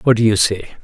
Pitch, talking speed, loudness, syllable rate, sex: 110 Hz, 285 wpm, -15 LUFS, 6.9 syllables/s, male